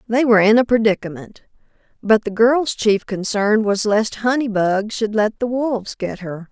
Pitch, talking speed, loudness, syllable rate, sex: 220 Hz, 185 wpm, -18 LUFS, 4.7 syllables/s, female